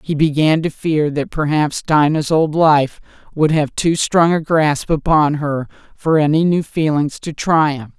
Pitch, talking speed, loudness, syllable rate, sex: 155 Hz, 175 wpm, -16 LUFS, 4.1 syllables/s, female